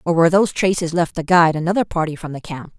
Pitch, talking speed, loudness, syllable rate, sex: 170 Hz, 260 wpm, -17 LUFS, 7.2 syllables/s, female